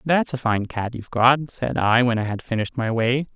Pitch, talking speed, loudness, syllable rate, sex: 120 Hz, 250 wpm, -21 LUFS, 5.4 syllables/s, male